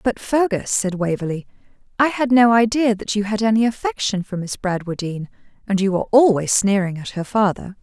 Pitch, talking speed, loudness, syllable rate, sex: 205 Hz, 185 wpm, -19 LUFS, 5.6 syllables/s, female